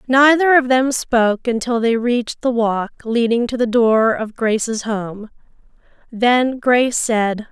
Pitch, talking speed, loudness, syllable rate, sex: 235 Hz, 150 wpm, -17 LUFS, 4.0 syllables/s, female